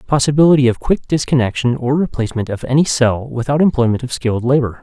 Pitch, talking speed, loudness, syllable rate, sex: 130 Hz, 175 wpm, -16 LUFS, 6.5 syllables/s, male